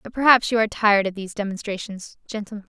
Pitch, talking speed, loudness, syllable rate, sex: 210 Hz, 195 wpm, -21 LUFS, 7.1 syllables/s, female